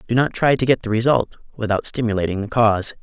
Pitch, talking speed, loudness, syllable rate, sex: 115 Hz, 220 wpm, -19 LUFS, 6.4 syllables/s, male